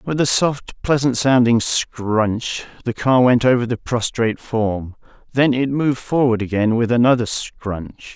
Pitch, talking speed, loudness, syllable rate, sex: 120 Hz, 155 wpm, -18 LUFS, 4.2 syllables/s, male